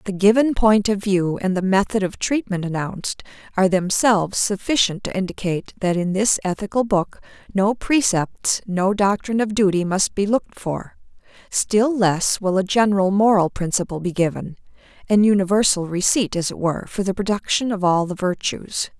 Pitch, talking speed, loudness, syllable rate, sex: 195 Hz, 165 wpm, -20 LUFS, 5.1 syllables/s, female